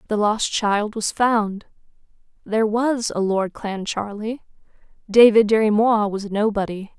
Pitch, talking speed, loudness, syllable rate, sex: 215 Hz, 130 wpm, -20 LUFS, 4.1 syllables/s, female